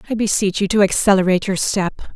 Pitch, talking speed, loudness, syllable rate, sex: 195 Hz, 195 wpm, -17 LUFS, 6.8 syllables/s, female